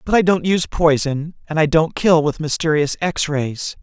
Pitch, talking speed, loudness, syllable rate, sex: 160 Hz, 205 wpm, -18 LUFS, 4.8 syllables/s, male